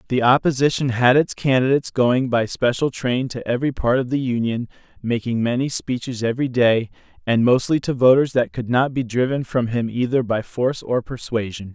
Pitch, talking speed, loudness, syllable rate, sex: 125 Hz, 185 wpm, -20 LUFS, 5.3 syllables/s, male